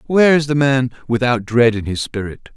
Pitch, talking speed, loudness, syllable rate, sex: 125 Hz, 210 wpm, -16 LUFS, 5.2 syllables/s, male